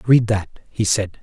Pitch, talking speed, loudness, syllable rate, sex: 105 Hz, 195 wpm, -19 LUFS, 4.6 syllables/s, male